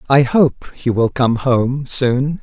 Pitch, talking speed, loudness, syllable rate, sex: 130 Hz, 175 wpm, -16 LUFS, 3.3 syllables/s, male